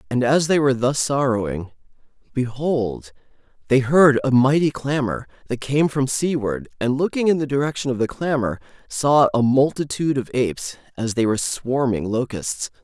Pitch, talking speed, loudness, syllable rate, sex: 130 Hz, 160 wpm, -20 LUFS, 4.9 syllables/s, male